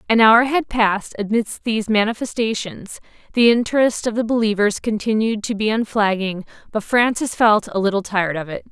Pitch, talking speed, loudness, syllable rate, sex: 215 Hz, 160 wpm, -18 LUFS, 5.3 syllables/s, female